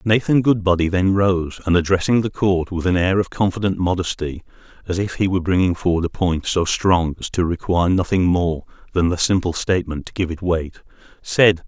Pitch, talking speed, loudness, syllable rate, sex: 90 Hz, 195 wpm, -19 LUFS, 5.4 syllables/s, male